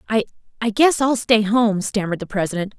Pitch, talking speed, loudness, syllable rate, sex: 220 Hz, 170 wpm, -19 LUFS, 5.9 syllables/s, female